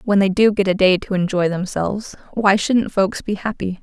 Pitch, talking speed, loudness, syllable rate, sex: 200 Hz, 220 wpm, -18 LUFS, 5.0 syllables/s, female